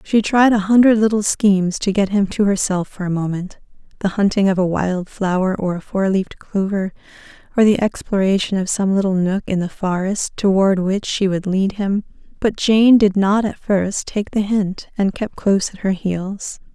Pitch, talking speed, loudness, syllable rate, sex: 195 Hz, 195 wpm, -18 LUFS, 4.8 syllables/s, female